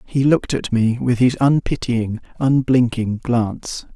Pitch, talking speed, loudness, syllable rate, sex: 125 Hz, 135 wpm, -18 LUFS, 4.3 syllables/s, male